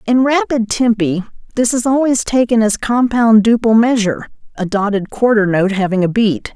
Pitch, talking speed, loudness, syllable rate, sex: 225 Hz, 165 wpm, -14 LUFS, 5.0 syllables/s, female